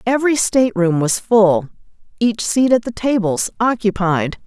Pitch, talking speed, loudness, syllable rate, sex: 215 Hz, 135 wpm, -16 LUFS, 4.6 syllables/s, female